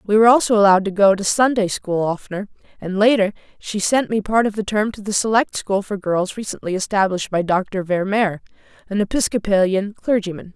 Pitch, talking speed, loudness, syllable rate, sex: 200 Hz, 195 wpm, -19 LUFS, 5.8 syllables/s, female